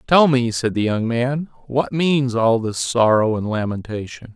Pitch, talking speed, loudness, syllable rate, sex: 120 Hz, 180 wpm, -19 LUFS, 4.2 syllables/s, male